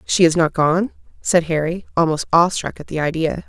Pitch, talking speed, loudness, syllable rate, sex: 165 Hz, 205 wpm, -18 LUFS, 5.2 syllables/s, female